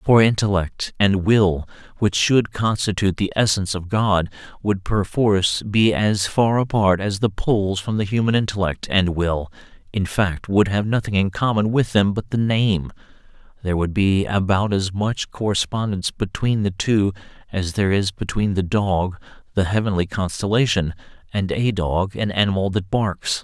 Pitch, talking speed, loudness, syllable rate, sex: 100 Hz, 165 wpm, -20 LUFS, 4.7 syllables/s, male